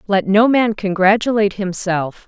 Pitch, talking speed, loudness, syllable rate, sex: 200 Hz, 130 wpm, -16 LUFS, 4.7 syllables/s, female